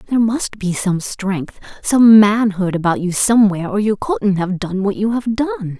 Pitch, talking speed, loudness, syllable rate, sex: 200 Hz, 195 wpm, -16 LUFS, 4.7 syllables/s, female